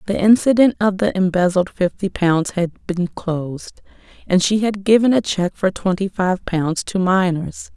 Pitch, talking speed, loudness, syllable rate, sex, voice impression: 190 Hz, 170 wpm, -18 LUFS, 4.5 syllables/s, female, very feminine, middle-aged, thin, slightly relaxed, slightly weak, bright, soft, clear, slightly fluent, slightly raspy, cute, slightly cool, intellectual, refreshing, very sincere, very calm, friendly, very reassuring, unique, very elegant, slightly wild, sweet, lively, very kind, slightly modest